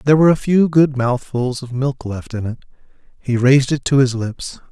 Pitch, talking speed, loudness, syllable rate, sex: 130 Hz, 215 wpm, -17 LUFS, 5.4 syllables/s, male